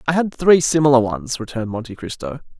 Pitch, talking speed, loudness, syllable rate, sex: 135 Hz, 185 wpm, -18 LUFS, 6.1 syllables/s, male